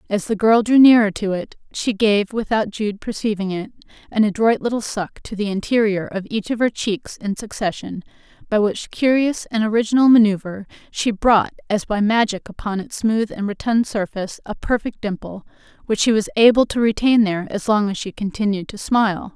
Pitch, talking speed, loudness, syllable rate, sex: 210 Hz, 190 wpm, -19 LUFS, 5.3 syllables/s, female